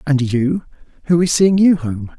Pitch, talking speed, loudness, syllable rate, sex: 150 Hz, 190 wpm, -16 LUFS, 4.3 syllables/s, male